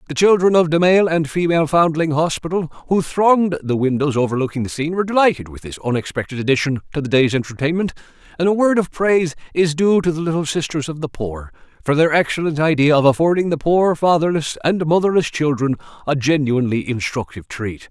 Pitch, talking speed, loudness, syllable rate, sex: 155 Hz, 190 wpm, -18 LUFS, 6.2 syllables/s, male